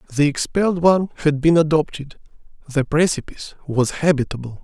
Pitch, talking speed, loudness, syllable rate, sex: 150 Hz, 130 wpm, -19 LUFS, 6.1 syllables/s, male